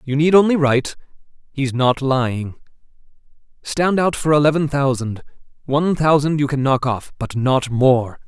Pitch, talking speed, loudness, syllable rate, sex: 140 Hz, 150 wpm, -18 LUFS, 4.8 syllables/s, male